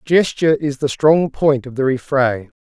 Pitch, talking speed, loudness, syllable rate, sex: 140 Hz, 185 wpm, -17 LUFS, 4.5 syllables/s, male